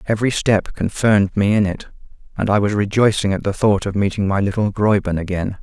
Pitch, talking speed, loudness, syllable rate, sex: 100 Hz, 205 wpm, -18 LUFS, 5.9 syllables/s, male